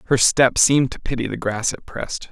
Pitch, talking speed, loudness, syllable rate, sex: 125 Hz, 235 wpm, -19 LUFS, 5.2 syllables/s, male